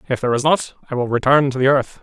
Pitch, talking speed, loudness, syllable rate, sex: 135 Hz, 295 wpm, -18 LUFS, 7.1 syllables/s, male